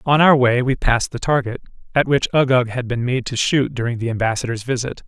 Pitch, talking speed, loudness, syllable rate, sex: 125 Hz, 225 wpm, -18 LUFS, 6.0 syllables/s, male